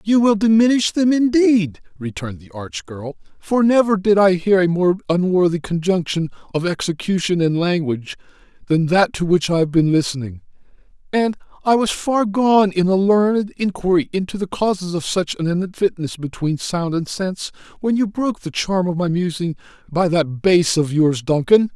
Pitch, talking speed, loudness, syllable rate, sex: 180 Hz, 175 wpm, -18 LUFS, 5.0 syllables/s, male